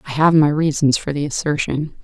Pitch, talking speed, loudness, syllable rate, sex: 145 Hz, 205 wpm, -17 LUFS, 5.3 syllables/s, female